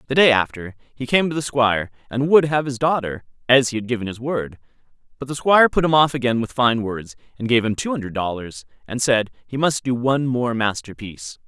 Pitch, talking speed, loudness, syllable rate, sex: 125 Hz, 225 wpm, -20 LUFS, 5.7 syllables/s, male